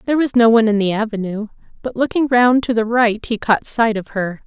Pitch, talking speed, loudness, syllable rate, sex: 225 Hz, 240 wpm, -16 LUFS, 5.9 syllables/s, female